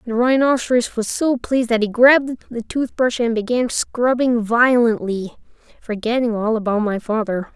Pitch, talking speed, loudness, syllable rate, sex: 235 Hz, 150 wpm, -18 LUFS, 4.8 syllables/s, female